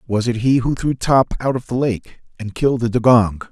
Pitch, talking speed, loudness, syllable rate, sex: 120 Hz, 240 wpm, -17 LUFS, 5.4 syllables/s, male